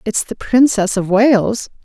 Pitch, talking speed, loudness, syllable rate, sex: 220 Hz, 165 wpm, -14 LUFS, 3.7 syllables/s, female